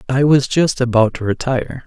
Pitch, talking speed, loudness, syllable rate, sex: 125 Hz, 195 wpm, -16 LUFS, 5.3 syllables/s, male